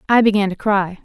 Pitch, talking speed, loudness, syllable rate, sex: 200 Hz, 230 wpm, -17 LUFS, 6.0 syllables/s, female